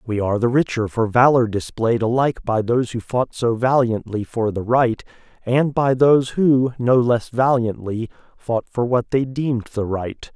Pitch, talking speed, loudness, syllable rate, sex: 120 Hz, 180 wpm, -19 LUFS, 4.7 syllables/s, male